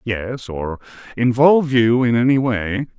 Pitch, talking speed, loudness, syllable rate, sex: 120 Hz, 140 wpm, -17 LUFS, 4.1 syllables/s, male